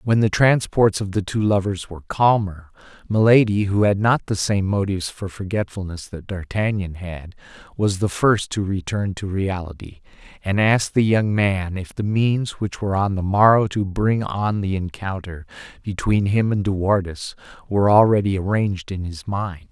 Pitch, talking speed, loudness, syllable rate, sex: 100 Hz, 175 wpm, -20 LUFS, 4.8 syllables/s, male